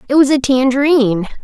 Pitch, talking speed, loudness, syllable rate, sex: 265 Hz, 165 wpm, -13 LUFS, 6.3 syllables/s, female